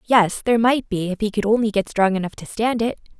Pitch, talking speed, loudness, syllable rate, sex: 215 Hz, 265 wpm, -20 LUFS, 6.0 syllables/s, female